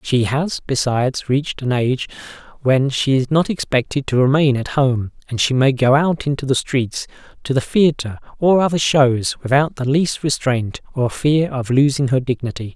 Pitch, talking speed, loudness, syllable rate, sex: 135 Hz, 185 wpm, -18 LUFS, 4.8 syllables/s, male